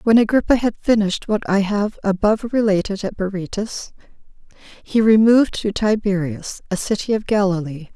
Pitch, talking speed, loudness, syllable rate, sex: 205 Hz, 145 wpm, -19 LUFS, 5.2 syllables/s, female